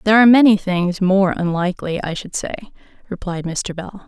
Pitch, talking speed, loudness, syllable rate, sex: 190 Hz, 175 wpm, -17 LUFS, 5.6 syllables/s, female